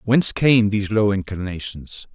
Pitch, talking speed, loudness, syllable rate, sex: 105 Hz, 140 wpm, -19 LUFS, 5.0 syllables/s, male